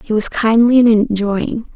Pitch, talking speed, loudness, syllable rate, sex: 225 Hz, 170 wpm, -14 LUFS, 4.3 syllables/s, female